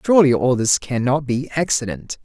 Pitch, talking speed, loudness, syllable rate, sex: 135 Hz, 160 wpm, -18 LUFS, 5.3 syllables/s, male